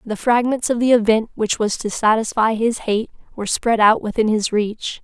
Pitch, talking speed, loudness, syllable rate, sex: 220 Hz, 205 wpm, -18 LUFS, 5.0 syllables/s, female